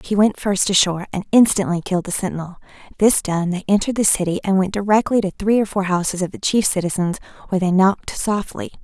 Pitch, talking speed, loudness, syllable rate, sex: 195 Hz, 210 wpm, -18 LUFS, 6.4 syllables/s, female